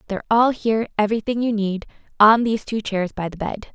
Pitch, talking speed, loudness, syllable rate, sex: 215 Hz, 210 wpm, -20 LUFS, 6.3 syllables/s, female